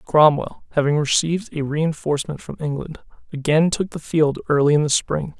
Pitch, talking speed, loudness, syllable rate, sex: 150 Hz, 165 wpm, -20 LUFS, 5.4 syllables/s, male